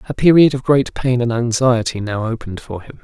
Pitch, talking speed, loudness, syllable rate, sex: 120 Hz, 215 wpm, -16 LUFS, 5.6 syllables/s, male